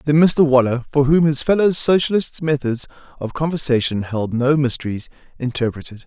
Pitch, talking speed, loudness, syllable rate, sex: 140 Hz, 150 wpm, -18 LUFS, 5.3 syllables/s, male